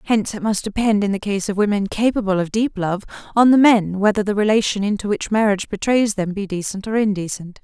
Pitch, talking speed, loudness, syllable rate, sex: 205 Hz, 210 wpm, -19 LUFS, 6.0 syllables/s, female